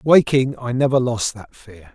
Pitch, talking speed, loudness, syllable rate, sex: 125 Hz, 185 wpm, -18 LUFS, 4.2 syllables/s, male